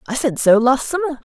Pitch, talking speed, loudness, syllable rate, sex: 270 Hz, 230 wpm, -16 LUFS, 5.5 syllables/s, female